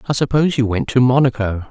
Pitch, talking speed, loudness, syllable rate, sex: 125 Hz, 210 wpm, -16 LUFS, 6.8 syllables/s, male